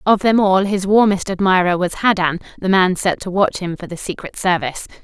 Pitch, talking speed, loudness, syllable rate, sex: 185 Hz, 215 wpm, -17 LUFS, 5.5 syllables/s, female